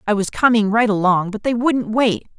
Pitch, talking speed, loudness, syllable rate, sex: 220 Hz, 225 wpm, -17 LUFS, 5.1 syllables/s, female